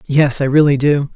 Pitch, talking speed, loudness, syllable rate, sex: 140 Hz, 205 wpm, -14 LUFS, 5.0 syllables/s, male